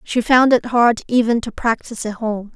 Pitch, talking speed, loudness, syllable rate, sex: 230 Hz, 210 wpm, -17 LUFS, 5.0 syllables/s, female